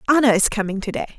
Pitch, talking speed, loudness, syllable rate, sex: 225 Hz, 200 wpm, -19 LUFS, 7.7 syllables/s, female